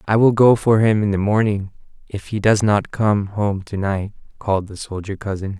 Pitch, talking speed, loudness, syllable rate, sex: 105 Hz, 215 wpm, -19 LUFS, 5.0 syllables/s, male